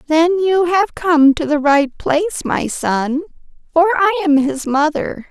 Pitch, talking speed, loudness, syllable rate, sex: 315 Hz, 170 wpm, -15 LUFS, 4.2 syllables/s, female